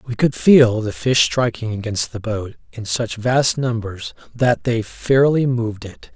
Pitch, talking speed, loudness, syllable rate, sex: 115 Hz, 175 wpm, -18 LUFS, 4.1 syllables/s, male